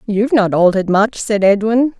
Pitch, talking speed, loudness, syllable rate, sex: 215 Hz, 180 wpm, -14 LUFS, 5.5 syllables/s, female